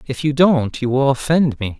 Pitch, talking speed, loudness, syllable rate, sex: 135 Hz, 235 wpm, -17 LUFS, 4.8 syllables/s, male